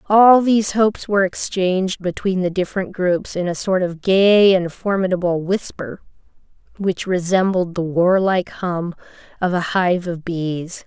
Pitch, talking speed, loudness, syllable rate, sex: 185 Hz, 150 wpm, -18 LUFS, 4.5 syllables/s, female